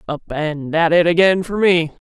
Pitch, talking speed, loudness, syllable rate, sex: 170 Hz, 200 wpm, -16 LUFS, 5.3 syllables/s, male